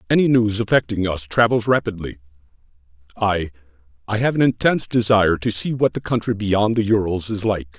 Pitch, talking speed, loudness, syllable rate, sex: 100 Hz, 160 wpm, -19 LUFS, 5.7 syllables/s, male